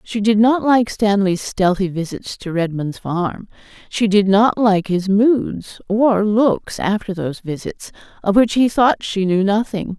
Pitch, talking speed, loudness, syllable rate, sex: 205 Hz, 170 wpm, -17 LUFS, 4.0 syllables/s, female